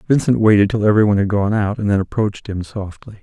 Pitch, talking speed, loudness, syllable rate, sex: 105 Hz, 225 wpm, -17 LUFS, 6.6 syllables/s, male